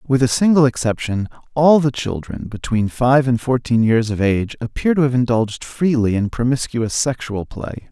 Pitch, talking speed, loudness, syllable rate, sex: 125 Hz, 175 wpm, -18 LUFS, 4.9 syllables/s, male